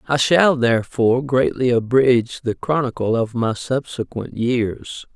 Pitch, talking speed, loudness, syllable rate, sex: 125 Hz, 130 wpm, -19 LUFS, 4.3 syllables/s, male